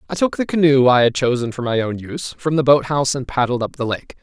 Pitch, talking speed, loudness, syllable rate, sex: 135 Hz, 285 wpm, -18 LUFS, 6.3 syllables/s, male